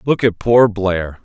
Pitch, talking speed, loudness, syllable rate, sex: 105 Hz, 195 wpm, -15 LUFS, 3.6 syllables/s, male